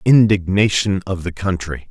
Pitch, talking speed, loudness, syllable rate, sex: 95 Hz, 125 wpm, -17 LUFS, 4.5 syllables/s, male